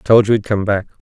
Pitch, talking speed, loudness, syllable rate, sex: 105 Hz, 270 wpm, -16 LUFS, 5.6 syllables/s, male